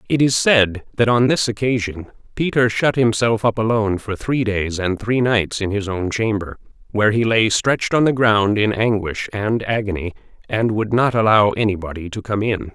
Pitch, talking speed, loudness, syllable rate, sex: 110 Hz, 200 wpm, -18 LUFS, 5.0 syllables/s, male